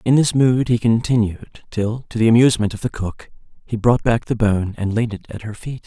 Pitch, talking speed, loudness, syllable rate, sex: 115 Hz, 235 wpm, -19 LUFS, 5.5 syllables/s, male